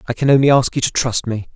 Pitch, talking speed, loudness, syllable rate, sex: 125 Hz, 310 wpm, -16 LUFS, 6.5 syllables/s, male